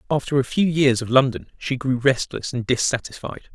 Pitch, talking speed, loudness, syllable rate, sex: 130 Hz, 185 wpm, -21 LUFS, 5.4 syllables/s, male